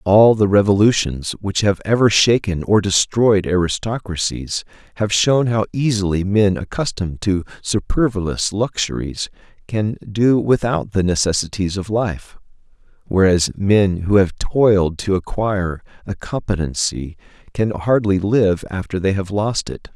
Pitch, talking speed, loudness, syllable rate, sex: 100 Hz, 130 wpm, -18 LUFS, 4.3 syllables/s, male